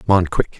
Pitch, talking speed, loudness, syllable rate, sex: 90 Hz, 300 wpm, -18 LUFS, 6.7 syllables/s, male